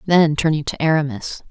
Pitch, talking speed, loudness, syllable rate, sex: 150 Hz, 160 wpm, -19 LUFS, 5.4 syllables/s, female